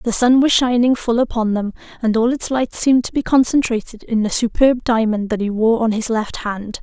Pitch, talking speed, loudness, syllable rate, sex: 230 Hz, 230 wpm, -17 LUFS, 5.2 syllables/s, female